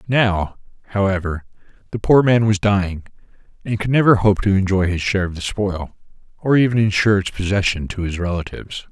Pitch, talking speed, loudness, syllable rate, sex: 100 Hz, 175 wpm, -18 LUFS, 5.8 syllables/s, male